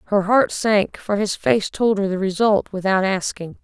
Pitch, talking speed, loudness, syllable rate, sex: 200 Hz, 200 wpm, -19 LUFS, 4.4 syllables/s, female